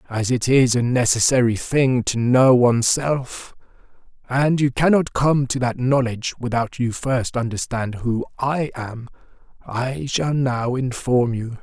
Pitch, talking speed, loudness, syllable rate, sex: 125 Hz, 150 wpm, -20 LUFS, 4.1 syllables/s, male